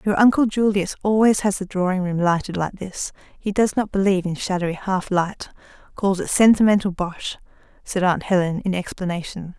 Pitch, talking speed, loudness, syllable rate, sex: 190 Hz, 170 wpm, -21 LUFS, 5.3 syllables/s, female